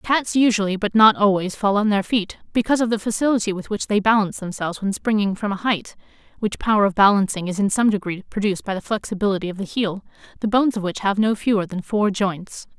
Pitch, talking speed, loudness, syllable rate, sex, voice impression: 205 Hz, 225 wpm, -20 LUFS, 6.3 syllables/s, female, feminine, adult-like, tensed, powerful, hard, clear, fluent, intellectual, calm, slightly unique, lively, sharp